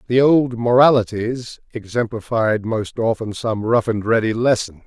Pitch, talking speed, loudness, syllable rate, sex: 115 Hz, 135 wpm, -18 LUFS, 4.4 syllables/s, male